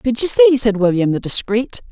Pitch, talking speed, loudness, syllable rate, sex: 225 Hz, 220 wpm, -15 LUFS, 4.9 syllables/s, female